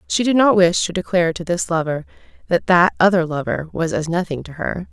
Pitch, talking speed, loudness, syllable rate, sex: 175 Hz, 220 wpm, -18 LUFS, 5.7 syllables/s, female